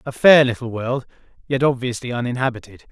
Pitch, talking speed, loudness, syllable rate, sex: 125 Hz, 145 wpm, -19 LUFS, 6.0 syllables/s, male